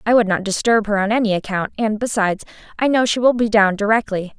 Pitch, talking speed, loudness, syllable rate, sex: 215 Hz, 230 wpm, -18 LUFS, 6.2 syllables/s, female